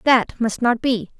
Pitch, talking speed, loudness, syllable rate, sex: 235 Hz, 200 wpm, -20 LUFS, 4.1 syllables/s, female